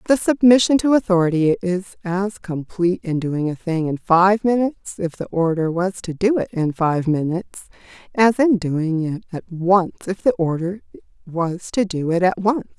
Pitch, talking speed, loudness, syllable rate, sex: 185 Hz, 185 wpm, -19 LUFS, 4.8 syllables/s, female